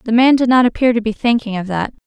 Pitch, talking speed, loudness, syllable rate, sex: 230 Hz, 290 wpm, -15 LUFS, 6.3 syllables/s, female